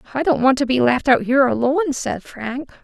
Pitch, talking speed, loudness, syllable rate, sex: 265 Hz, 235 wpm, -18 LUFS, 5.7 syllables/s, female